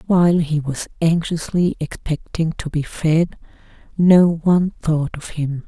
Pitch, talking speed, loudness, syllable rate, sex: 160 Hz, 140 wpm, -19 LUFS, 4.0 syllables/s, female